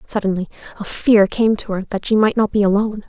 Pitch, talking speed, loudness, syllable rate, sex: 205 Hz, 235 wpm, -17 LUFS, 6.1 syllables/s, female